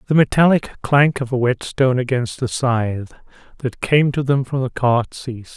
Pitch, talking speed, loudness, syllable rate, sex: 130 Hz, 185 wpm, -18 LUFS, 4.9 syllables/s, male